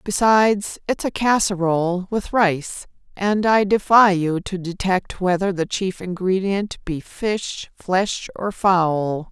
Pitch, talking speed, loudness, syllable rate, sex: 190 Hz, 135 wpm, -20 LUFS, 3.6 syllables/s, female